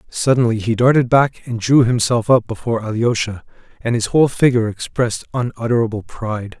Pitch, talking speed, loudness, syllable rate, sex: 115 Hz, 155 wpm, -17 LUFS, 5.8 syllables/s, male